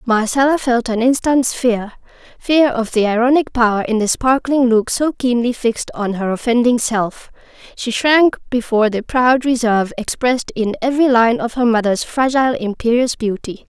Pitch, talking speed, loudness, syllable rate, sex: 240 Hz, 155 wpm, -16 LUFS, 5.0 syllables/s, female